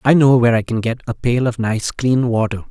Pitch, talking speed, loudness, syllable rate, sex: 120 Hz, 265 wpm, -17 LUFS, 5.5 syllables/s, male